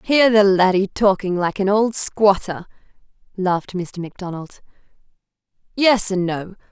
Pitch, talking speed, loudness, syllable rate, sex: 195 Hz, 125 wpm, -18 LUFS, 4.5 syllables/s, female